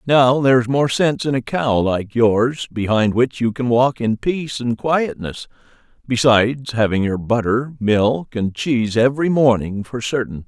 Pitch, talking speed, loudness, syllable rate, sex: 120 Hz, 165 wpm, -18 LUFS, 4.5 syllables/s, male